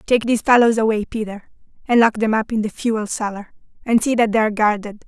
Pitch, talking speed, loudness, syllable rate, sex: 220 Hz, 225 wpm, -18 LUFS, 6.1 syllables/s, female